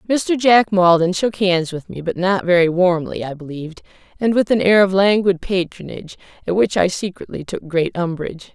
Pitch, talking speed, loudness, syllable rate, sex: 185 Hz, 190 wpm, -17 LUFS, 5.2 syllables/s, female